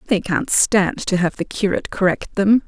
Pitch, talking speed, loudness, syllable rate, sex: 195 Hz, 200 wpm, -18 LUFS, 4.9 syllables/s, female